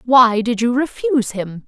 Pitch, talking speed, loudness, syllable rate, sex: 240 Hz, 180 wpm, -17 LUFS, 4.5 syllables/s, female